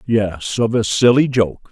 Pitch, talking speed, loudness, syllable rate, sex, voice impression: 110 Hz, 175 wpm, -16 LUFS, 3.8 syllables/s, male, masculine, adult-like, thick, tensed, powerful, raspy, cool, mature, wild, lively, slightly intense